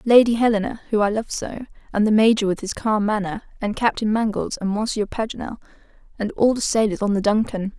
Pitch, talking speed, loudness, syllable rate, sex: 215 Hz, 200 wpm, -21 LUFS, 5.8 syllables/s, female